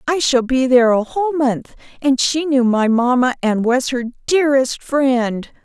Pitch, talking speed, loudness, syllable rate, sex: 260 Hz, 180 wpm, -16 LUFS, 4.6 syllables/s, female